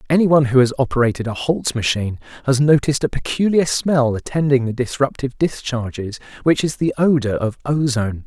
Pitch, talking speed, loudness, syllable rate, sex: 130 Hz, 160 wpm, -18 LUFS, 5.8 syllables/s, male